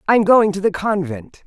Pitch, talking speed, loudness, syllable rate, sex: 215 Hz, 205 wpm, -16 LUFS, 4.7 syllables/s, female